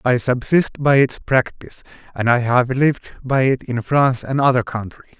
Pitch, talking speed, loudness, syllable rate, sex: 130 Hz, 185 wpm, -18 LUFS, 5.0 syllables/s, male